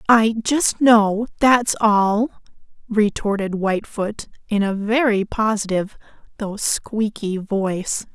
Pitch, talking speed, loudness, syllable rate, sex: 210 Hz, 105 wpm, -19 LUFS, 3.7 syllables/s, female